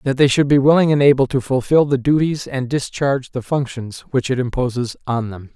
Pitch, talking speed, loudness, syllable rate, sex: 135 Hz, 215 wpm, -17 LUFS, 5.5 syllables/s, male